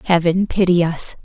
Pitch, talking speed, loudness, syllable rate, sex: 175 Hz, 145 wpm, -17 LUFS, 4.7 syllables/s, female